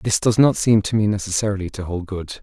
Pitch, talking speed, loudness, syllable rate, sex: 100 Hz, 250 wpm, -19 LUFS, 5.9 syllables/s, male